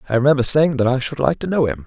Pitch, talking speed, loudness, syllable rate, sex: 125 Hz, 320 wpm, -18 LUFS, 7.1 syllables/s, male